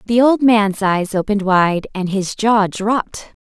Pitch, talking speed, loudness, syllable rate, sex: 205 Hz, 175 wpm, -16 LUFS, 4.1 syllables/s, female